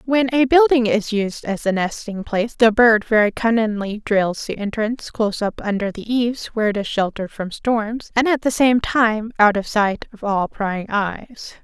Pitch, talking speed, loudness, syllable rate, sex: 220 Hz, 200 wpm, -19 LUFS, 4.7 syllables/s, female